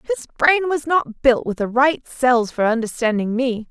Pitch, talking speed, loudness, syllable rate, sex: 255 Hz, 195 wpm, -19 LUFS, 4.7 syllables/s, female